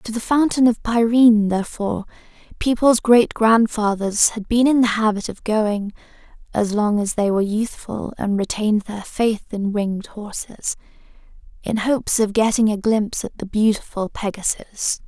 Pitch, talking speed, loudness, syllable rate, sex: 215 Hz, 155 wpm, -19 LUFS, 3.6 syllables/s, female